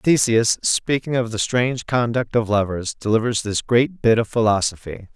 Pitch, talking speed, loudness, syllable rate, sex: 115 Hz, 165 wpm, -20 LUFS, 4.8 syllables/s, male